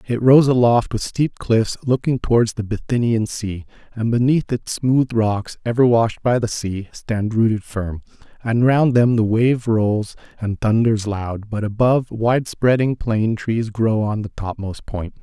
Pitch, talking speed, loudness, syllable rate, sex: 115 Hz, 175 wpm, -19 LUFS, 4.3 syllables/s, male